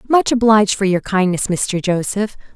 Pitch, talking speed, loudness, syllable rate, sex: 200 Hz, 165 wpm, -16 LUFS, 5.0 syllables/s, female